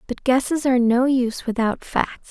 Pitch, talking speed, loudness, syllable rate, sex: 250 Hz, 180 wpm, -20 LUFS, 5.6 syllables/s, female